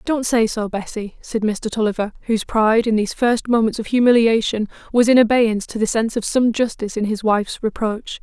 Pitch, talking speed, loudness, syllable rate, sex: 225 Hz, 205 wpm, -18 LUFS, 5.9 syllables/s, female